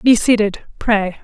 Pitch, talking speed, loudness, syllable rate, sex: 215 Hz, 145 wpm, -16 LUFS, 3.9 syllables/s, female